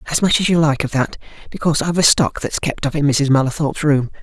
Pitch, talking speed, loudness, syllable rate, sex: 150 Hz, 255 wpm, -17 LUFS, 6.7 syllables/s, male